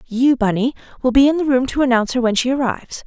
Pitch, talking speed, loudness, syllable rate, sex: 255 Hz, 255 wpm, -17 LUFS, 6.8 syllables/s, female